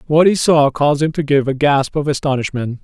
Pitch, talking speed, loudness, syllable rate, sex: 145 Hz, 235 wpm, -15 LUFS, 5.6 syllables/s, male